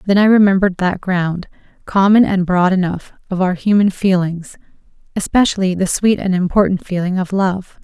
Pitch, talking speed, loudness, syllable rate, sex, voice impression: 190 Hz, 160 wpm, -15 LUFS, 5.2 syllables/s, female, feminine, adult-like, slightly cute, slightly sincere, calm, slightly sweet